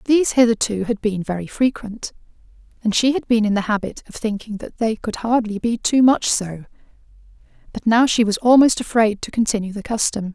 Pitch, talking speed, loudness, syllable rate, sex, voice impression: 220 Hz, 190 wpm, -19 LUFS, 5.5 syllables/s, female, feminine, adult-like, slightly tensed, powerful, bright, soft, raspy, intellectual, friendly, slightly kind